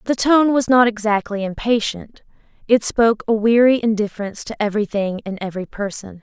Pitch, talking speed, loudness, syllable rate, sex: 220 Hz, 155 wpm, -18 LUFS, 5.8 syllables/s, female